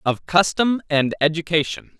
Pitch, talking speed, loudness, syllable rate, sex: 165 Hz, 120 wpm, -20 LUFS, 4.6 syllables/s, male